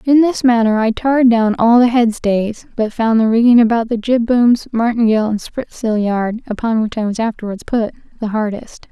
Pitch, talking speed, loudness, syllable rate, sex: 230 Hz, 200 wpm, -15 LUFS, 5.0 syllables/s, female